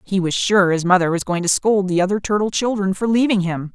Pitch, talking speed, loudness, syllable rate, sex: 190 Hz, 255 wpm, -18 LUFS, 5.8 syllables/s, female